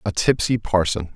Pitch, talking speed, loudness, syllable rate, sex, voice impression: 100 Hz, 155 wpm, -20 LUFS, 4.8 syllables/s, male, masculine, adult-like, thick, tensed, powerful, hard, raspy, cool, intellectual, friendly, wild, lively, kind, slightly modest